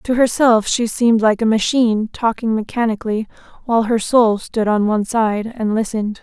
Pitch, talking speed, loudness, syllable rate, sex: 225 Hz, 175 wpm, -17 LUFS, 5.4 syllables/s, female